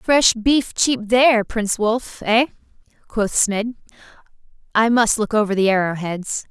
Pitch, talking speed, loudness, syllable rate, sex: 220 Hz, 150 wpm, -18 LUFS, 4.2 syllables/s, female